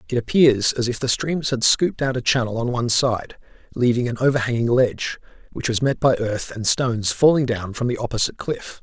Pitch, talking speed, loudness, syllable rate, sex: 120 Hz, 210 wpm, -20 LUFS, 5.7 syllables/s, male